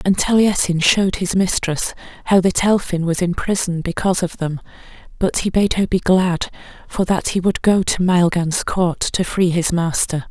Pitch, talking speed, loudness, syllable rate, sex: 180 Hz, 185 wpm, -18 LUFS, 4.7 syllables/s, female